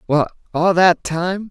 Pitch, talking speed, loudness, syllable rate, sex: 175 Hz, 160 wpm, -17 LUFS, 3.4 syllables/s, male